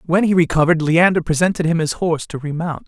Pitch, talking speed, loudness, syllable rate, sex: 165 Hz, 210 wpm, -17 LUFS, 6.4 syllables/s, male